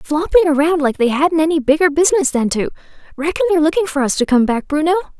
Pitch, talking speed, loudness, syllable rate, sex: 310 Hz, 210 wpm, -15 LUFS, 6.8 syllables/s, female